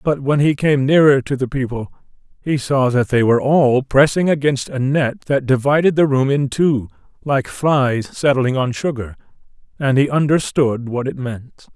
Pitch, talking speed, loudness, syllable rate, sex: 135 Hz, 180 wpm, -17 LUFS, 4.6 syllables/s, male